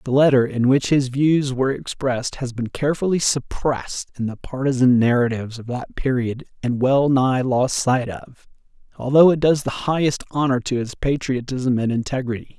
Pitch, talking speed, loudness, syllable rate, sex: 130 Hz, 165 wpm, -20 LUFS, 5.1 syllables/s, male